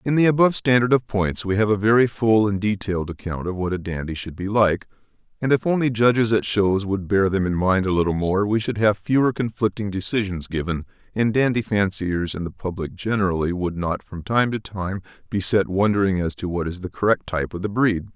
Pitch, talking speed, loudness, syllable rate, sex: 100 Hz, 225 wpm, -22 LUFS, 5.6 syllables/s, male